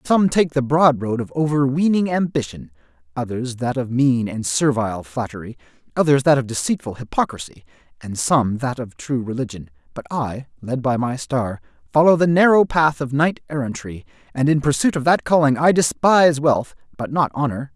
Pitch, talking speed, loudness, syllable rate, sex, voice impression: 135 Hz, 170 wpm, -19 LUFS, 5.2 syllables/s, male, masculine, adult-like, slightly middle-aged, tensed, powerful, bright, slightly soft, clear, very fluent, cool, slightly intellectual, refreshing, calm, slightly mature, slightly friendly, reassuring, slightly wild, slightly sweet, lively, kind, slightly intense